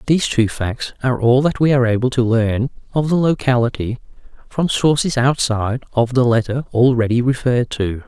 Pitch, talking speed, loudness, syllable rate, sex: 125 Hz, 170 wpm, -17 LUFS, 5.5 syllables/s, male